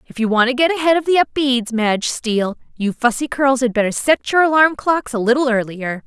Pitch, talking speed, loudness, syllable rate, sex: 255 Hz, 230 wpm, -17 LUFS, 5.7 syllables/s, female